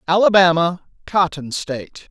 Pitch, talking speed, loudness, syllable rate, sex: 170 Hz, 85 wpm, -17 LUFS, 4.7 syllables/s, male